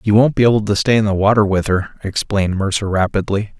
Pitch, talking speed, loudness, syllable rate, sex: 105 Hz, 235 wpm, -16 LUFS, 6.4 syllables/s, male